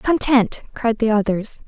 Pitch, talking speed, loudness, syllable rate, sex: 230 Hz, 145 wpm, -19 LUFS, 4.0 syllables/s, female